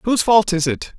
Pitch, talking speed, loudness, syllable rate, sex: 190 Hz, 245 wpm, -17 LUFS, 6.0 syllables/s, male